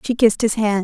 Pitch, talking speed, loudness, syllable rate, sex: 215 Hz, 285 wpm, -17 LUFS, 6.4 syllables/s, female